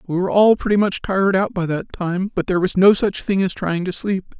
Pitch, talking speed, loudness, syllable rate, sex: 190 Hz, 275 wpm, -18 LUFS, 5.8 syllables/s, male